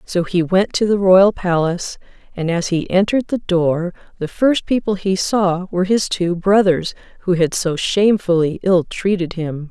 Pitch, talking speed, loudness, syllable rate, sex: 185 Hz, 180 wpm, -17 LUFS, 4.6 syllables/s, female